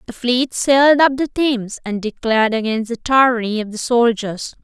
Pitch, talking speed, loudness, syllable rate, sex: 240 Hz, 180 wpm, -17 LUFS, 5.1 syllables/s, female